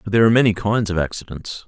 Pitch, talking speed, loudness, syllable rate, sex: 100 Hz, 250 wpm, -18 LUFS, 7.6 syllables/s, male